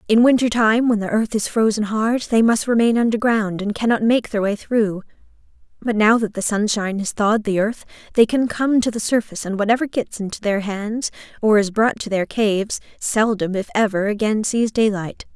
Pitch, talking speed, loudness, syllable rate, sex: 215 Hz, 205 wpm, -19 LUFS, 5.3 syllables/s, female